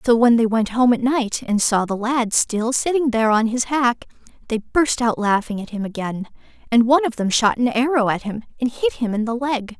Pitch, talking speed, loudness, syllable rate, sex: 235 Hz, 240 wpm, -19 LUFS, 5.2 syllables/s, female